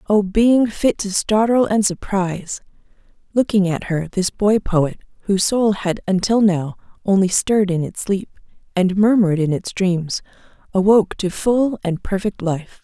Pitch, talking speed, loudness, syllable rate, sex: 195 Hz, 160 wpm, -18 LUFS, 4.6 syllables/s, female